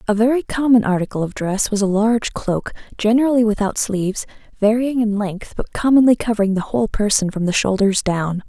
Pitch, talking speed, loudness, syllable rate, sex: 215 Hz, 185 wpm, -18 LUFS, 5.7 syllables/s, female